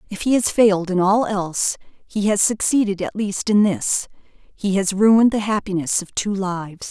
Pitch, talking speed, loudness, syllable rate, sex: 200 Hz, 190 wpm, -19 LUFS, 4.7 syllables/s, female